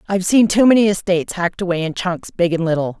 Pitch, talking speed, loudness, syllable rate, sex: 185 Hz, 240 wpm, -17 LUFS, 6.8 syllables/s, female